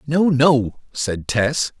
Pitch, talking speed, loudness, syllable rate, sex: 135 Hz, 135 wpm, -19 LUFS, 2.7 syllables/s, male